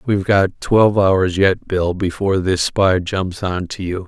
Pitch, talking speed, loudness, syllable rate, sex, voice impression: 95 Hz, 175 wpm, -17 LUFS, 4.3 syllables/s, male, masculine, middle-aged, tensed, powerful, slightly soft, slightly muffled, raspy, cool, calm, mature, friendly, reassuring, wild, kind